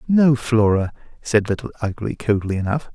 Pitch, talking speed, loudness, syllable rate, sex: 115 Hz, 145 wpm, -20 LUFS, 5.1 syllables/s, male